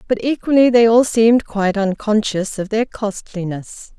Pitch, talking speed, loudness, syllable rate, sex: 220 Hz, 150 wpm, -16 LUFS, 4.7 syllables/s, female